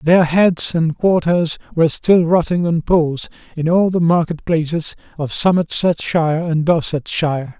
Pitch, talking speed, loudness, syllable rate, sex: 165 Hz, 140 wpm, -16 LUFS, 4.5 syllables/s, male